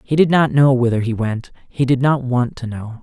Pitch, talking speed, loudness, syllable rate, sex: 130 Hz, 260 wpm, -17 LUFS, 5.0 syllables/s, male